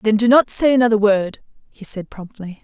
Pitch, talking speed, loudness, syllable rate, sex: 215 Hz, 205 wpm, -16 LUFS, 5.3 syllables/s, female